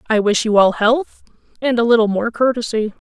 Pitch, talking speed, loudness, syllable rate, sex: 230 Hz, 195 wpm, -16 LUFS, 5.5 syllables/s, female